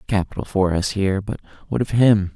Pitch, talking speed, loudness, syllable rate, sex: 100 Hz, 230 wpm, -20 LUFS, 6.4 syllables/s, male